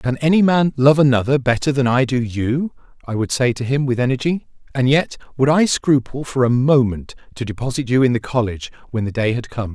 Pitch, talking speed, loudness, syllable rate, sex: 130 Hz, 220 wpm, -18 LUFS, 5.6 syllables/s, male